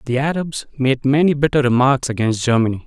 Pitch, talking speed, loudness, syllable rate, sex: 135 Hz, 165 wpm, -17 LUFS, 5.8 syllables/s, male